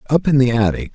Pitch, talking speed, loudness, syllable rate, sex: 125 Hz, 255 wpm, -16 LUFS, 6.8 syllables/s, male